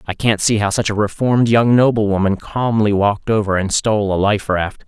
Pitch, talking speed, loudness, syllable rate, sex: 105 Hz, 210 wpm, -16 LUFS, 5.5 syllables/s, male